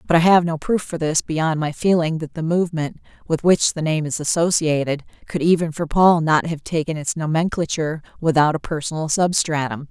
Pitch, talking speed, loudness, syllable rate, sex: 160 Hz, 195 wpm, -20 LUFS, 5.4 syllables/s, female